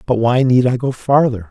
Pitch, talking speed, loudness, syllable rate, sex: 125 Hz, 240 wpm, -15 LUFS, 5.1 syllables/s, male